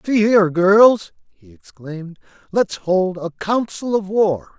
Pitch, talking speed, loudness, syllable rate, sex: 190 Hz, 145 wpm, -17 LUFS, 3.9 syllables/s, male